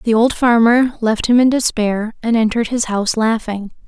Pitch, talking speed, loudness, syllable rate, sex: 230 Hz, 185 wpm, -15 LUFS, 5.0 syllables/s, female